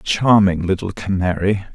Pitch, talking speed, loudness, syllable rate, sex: 95 Hz, 105 wpm, -17 LUFS, 4.3 syllables/s, male